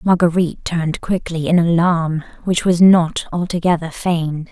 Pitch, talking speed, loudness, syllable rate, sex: 170 Hz, 135 wpm, -17 LUFS, 4.8 syllables/s, female